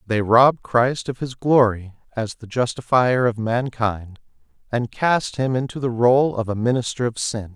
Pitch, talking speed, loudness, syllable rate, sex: 120 Hz, 175 wpm, -20 LUFS, 4.3 syllables/s, male